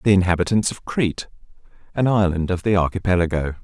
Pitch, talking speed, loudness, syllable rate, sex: 95 Hz, 150 wpm, -20 LUFS, 6.4 syllables/s, male